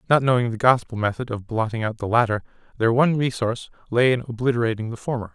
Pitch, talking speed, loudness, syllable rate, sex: 120 Hz, 200 wpm, -22 LUFS, 6.8 syllables/s, male